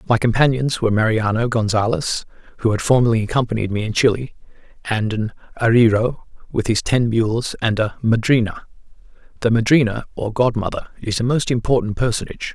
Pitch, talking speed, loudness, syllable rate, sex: 115 Hz, 150 wpm, -19 LUFS, 5.7 syllables/s, male